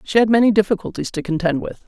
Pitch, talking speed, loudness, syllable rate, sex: 200 Hz, 225 wpm, -18 LUFS, 6.9 syllables/s, female